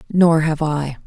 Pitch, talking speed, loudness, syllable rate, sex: 155 Hz, 170 wpm, -17 LUFS, 4.0 syllables/s, female